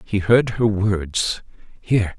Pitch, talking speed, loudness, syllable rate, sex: 100 Hz, 135 wpm, -20 LUFS, 3.5 syllables/s, male